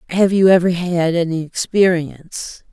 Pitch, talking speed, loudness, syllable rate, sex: 175 Hz, 130 wpm, -16 LUFS, 4.5 syllables/s, female